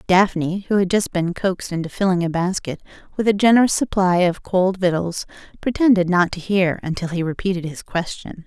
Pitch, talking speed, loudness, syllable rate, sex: 185 Hz, 185 wpm, -20 LUFS, 5.5 syllables/s, female